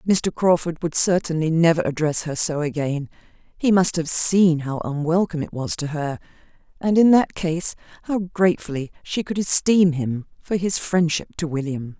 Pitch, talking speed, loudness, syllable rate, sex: 165 Hz, 170 wpm, -21 LUFS, 4.9 syllables/s, female